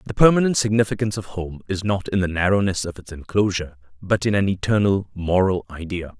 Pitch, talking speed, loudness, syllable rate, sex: 95 Hz, 185 wpm, -21 LUFS, 6.1 syllables/s, male